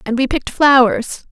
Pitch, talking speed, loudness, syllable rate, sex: 255 Hz, 180 wpm, -14 LUFS, 5.3 syllables/s, female